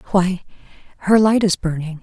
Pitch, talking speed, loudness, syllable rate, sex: 185 Hz, 150 wpm, -17 LUFS, 5.2 syllables/s, female